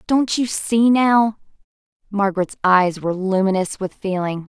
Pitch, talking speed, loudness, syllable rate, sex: 205 Hz, 120 wpm, -19 LUFS, 4.5 syllables/s, female